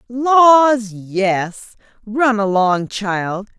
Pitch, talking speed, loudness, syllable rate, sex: 220 Hz, 85 wpm, -15 LUFS, 2.0 syllables/s, female